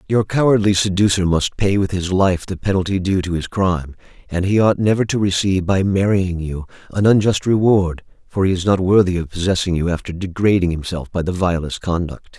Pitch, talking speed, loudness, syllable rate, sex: 95 Hz, 200 wpm, -18 LUFS, 5.5 syllables/s, male